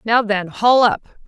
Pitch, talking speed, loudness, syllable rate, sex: 220 Hz, 190 wpm, -16 LUFS, 3.6 syllables/s, female